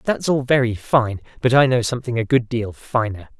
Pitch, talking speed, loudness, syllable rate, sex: 120 Hz, 210 wpm, -19 LUFS, 5.4 syllables/s, male